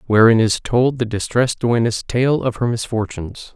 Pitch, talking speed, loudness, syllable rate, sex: 115 Hz, 170 wpm, -18 LUFS, 5.1 syllables/s, male